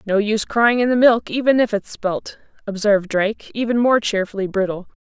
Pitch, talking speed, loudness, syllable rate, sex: 215 Hz, 190 wpm, -18 LUFS, 5.6 syllables/s, female